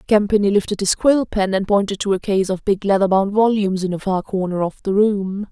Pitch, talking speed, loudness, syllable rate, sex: 200 Hz, 240 wpm, -18 LUFS, 5.6 syllables/s, female